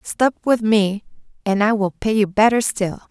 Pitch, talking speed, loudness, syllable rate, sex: 210 Hz, 195 wpm, -18 LUFS, 4.5 syllables/s, female